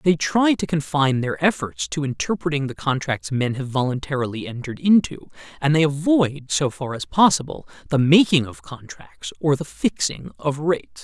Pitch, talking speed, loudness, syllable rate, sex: 145 Hz, 170 wpm, -21 LUFS, 5.1 syllables/s, male